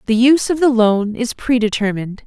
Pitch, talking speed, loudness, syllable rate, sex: 235 Hz, 210 wpm, -16 LUFS, 5.8 syllables/s, female